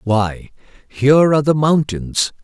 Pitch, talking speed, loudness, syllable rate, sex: 135 Hz, 125 wpm, -15 LUFS, 4.2 syllables/s, male